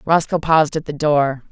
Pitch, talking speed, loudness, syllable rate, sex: 150 Hz, 200 wpm, -17 LUFS, 5.1 syllables/s, female